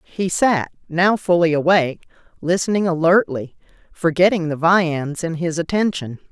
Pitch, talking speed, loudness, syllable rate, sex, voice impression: 170 Hz, 125 wpm, -18 LUFS, 4.6 syllables/s, female, feminine, middle-aged, tensed, powerful, bright, clear, fluent, intellectual, calm, friendly, reassuring, lively